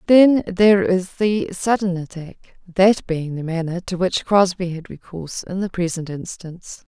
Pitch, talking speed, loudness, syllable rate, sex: 180 Hz, 155 wpm, -19 LUFS, 4.6 syllables/s, female